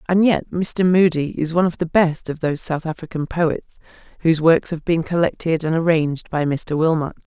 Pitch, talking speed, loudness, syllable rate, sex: 165 Hz, 195 wpm, -19 LUFS, 5.5 syllables/s, female